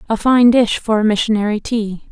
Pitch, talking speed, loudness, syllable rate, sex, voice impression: 220 Hz, 200 wpm, -15 LUFS, 1.6 syllables/s, female, very feminine, young, very thin, tensed, slightly weak, slightly bright, soft, clear, fluent, very cute, intellectual, refreshing, sincere, very calm, very friendly, very reassuring, very unique, very elegant, very sweet, lively, very kind, slightly sharp, modest, slightly light